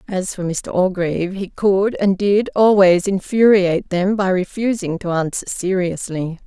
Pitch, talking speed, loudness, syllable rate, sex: 190 Hz, 150 wpm, -18 LUFS, 4.4 syllables/s, female